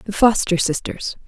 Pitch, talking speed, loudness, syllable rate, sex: 195 Hz, 140 wpm, -19 LUFS, 4.7 syllables/s, female